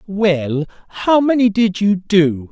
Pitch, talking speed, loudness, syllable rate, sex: 195 Hz, 145 wpm, -16 LUFS, 3.6 syllables/s, male